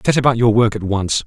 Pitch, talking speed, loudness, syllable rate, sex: 115 Hz, 285 wpm, -16 LUFS, 6.1 syllables/s, male